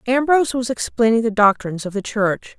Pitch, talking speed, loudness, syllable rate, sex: 230 Hz, 185 wpm, -18 LUFS, 5.7 syllables/s, female